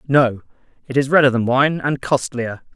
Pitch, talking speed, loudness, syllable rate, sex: 130 Hz, 175 wpm, -18 LUFS, 4.8 syllables/s, male